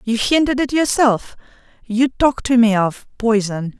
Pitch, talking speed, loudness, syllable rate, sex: 235 Hz, 160 wpm, -17 LUFS, 4.6 syllables/s, female